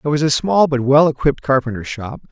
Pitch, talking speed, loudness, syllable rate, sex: 140 Hz, 235 wpm, -16 LUFS, 6.1 syllables/s, male